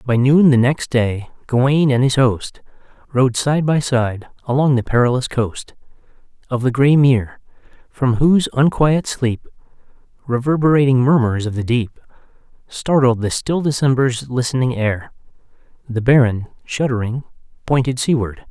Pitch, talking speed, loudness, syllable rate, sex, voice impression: 130 Hz, 135 wpm, -17 LUFS, 4.8 syllables/s, male, very masculine, very adult-like, middle-aged, very thick, slightly relaxed, slightly powerful, slightly bright, slightly soft, slightly muffled, fluent, cool, very intellectual, refreshing, sincere, very calm, slightly mature, friendly, reassuring, slightly unique, elegant, slightly sweet, lively, kind, slightly modest